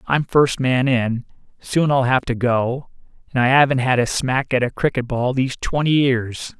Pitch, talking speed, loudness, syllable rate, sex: 130 Hz, 200 wpm, -19 LUFS, 4.6 syllables/s, male